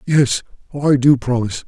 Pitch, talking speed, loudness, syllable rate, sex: 130 Hz, 145 wpm, -16 LUFS, 5.2 syllables/s, male